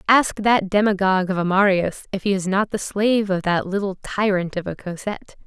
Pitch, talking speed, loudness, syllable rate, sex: 195 Hz, 210 wpm, -21 LUFS, 5.5 syllables/s, female